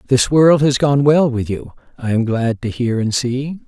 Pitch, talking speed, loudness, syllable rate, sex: 130 Hz, 230 wpm, -16 LUFS, 4.4 syllables/s, male